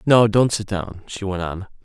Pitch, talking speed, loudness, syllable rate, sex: 100 Hz, 230 wpm, -20 LUFS, 4.5 syllables/s, male